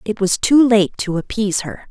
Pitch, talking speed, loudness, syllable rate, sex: 210 Hz, 220 wpm, -16 LUFS, 5.1 syllables/s, female